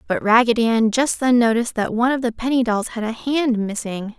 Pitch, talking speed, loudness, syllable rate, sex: 235 Hz, 230 wpm, -19 LUFS, 5.8 syllables/s, female